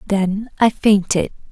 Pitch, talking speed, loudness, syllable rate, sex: 205 Hz, 120 wpm, -17 LUFS, 3.5 syllables/s, female